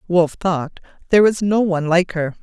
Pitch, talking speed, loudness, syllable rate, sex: 175 Hz, 200 wpm, -17 LUFS, 5.9 syllables/s, female